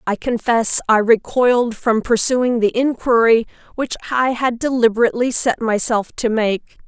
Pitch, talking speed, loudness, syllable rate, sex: 235 Hz, 140 wpm, -17 LUFS, 4.6 syllables/s, female